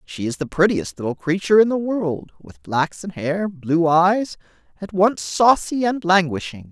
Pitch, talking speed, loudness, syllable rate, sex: 175 Hz, 160 wpm, -19 LUFS, 4.5 syllables/s, male